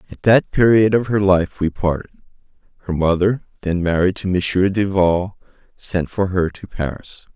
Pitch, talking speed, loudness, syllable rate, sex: 95 Hz, 165 wpm, -18 LUFS, 4.7 syllables/s, male